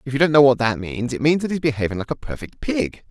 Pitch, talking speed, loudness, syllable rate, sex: 135 Hz, 310 wpm, -20 LUFS, 6.4 syllables/s, male